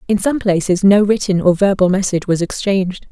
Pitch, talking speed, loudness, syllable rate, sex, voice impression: 195 Hz, 190 wpm, -15 LUFS, 5.8 syllables/s, female, feminine, adult-like, slightly fluent, slightly sincere, calm, slightly sweet